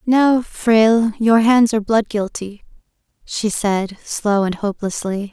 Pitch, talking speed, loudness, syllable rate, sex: 215 Hz, 135 wpm, -17 LUFS, 4.2 syllables/s, female